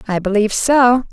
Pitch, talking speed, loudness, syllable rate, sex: 225 Hz, 160 wpm, -14 LUFS, 5.5 syllables/s, female